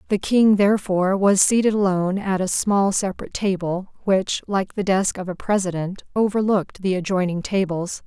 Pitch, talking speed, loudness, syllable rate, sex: 190 Hz, 165 wpm, -21 LUFS, 5.3 syllables/s, female